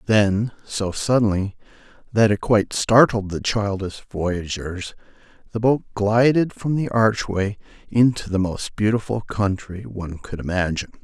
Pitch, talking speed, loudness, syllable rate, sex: 105 Hz, 130 wpm, -21 LUFS, 4.4 syllables/s, male